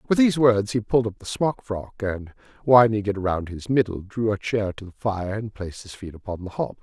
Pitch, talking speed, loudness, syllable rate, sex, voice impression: 105 Hz, 245 wpm, -23 LUFS, 5.5 syllables/s, male, very masculine, very adult-like, very middle-aged, very thick, slightly tensed, slightly powerful, slightly dark, hard, muffled, fluent, raspy, very cool, intellectual, very sincere, very calm, very mature, friendly, reassuring, wild, slightly sweet, slightly lively, kind, slightly modest